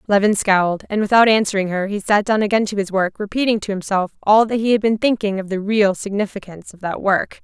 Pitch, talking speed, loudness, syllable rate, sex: 205 Hz, 235 wpm, -18 LUFS, 6.1 syllables/s, female